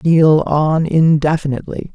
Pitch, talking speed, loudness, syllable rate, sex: 155 Hz, 90 wpm, -14 LUFS, 4.3 syllables/s, male